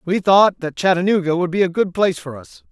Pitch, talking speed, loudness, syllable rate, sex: 180 Hz, 245 wpm, -17 LUFS, 6.0 syllables/s, male